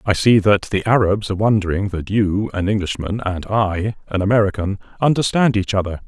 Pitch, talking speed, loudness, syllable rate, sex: 100 Hz, 180 wpm, -18 LUFS, 5.4 syllables/s, male